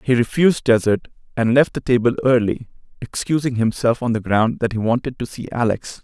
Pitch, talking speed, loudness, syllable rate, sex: 120 Hz, 190 wpm, -19 LUFS, 5.6 syllables/s, male